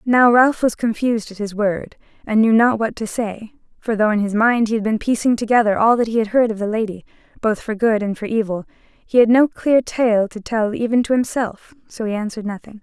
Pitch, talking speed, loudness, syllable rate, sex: 225 Hz, 240 wpm, -18 LUFS, 5.5 syllables/s, female